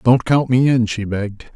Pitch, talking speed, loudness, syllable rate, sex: 120 Hz, 230 wpm, -17 LUFS, 4.9 syllables/s, male